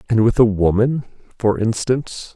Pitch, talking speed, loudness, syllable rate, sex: 115 Hz, 155 wpm, -18 LUFS, 5.0 syllables/s, male